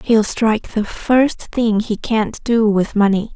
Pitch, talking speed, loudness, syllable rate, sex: 220 Hz, 180 wpm, -17 LUFS, 3.7 syllables/s, female